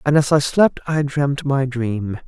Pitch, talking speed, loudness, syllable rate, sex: 135 Hz, 210 wpm, -19 LUFS, 4.4 syllables/s, male